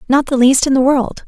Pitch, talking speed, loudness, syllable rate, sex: 265 Hz, 285 wpm, -13 LUFS, 5.5 syllables/s, female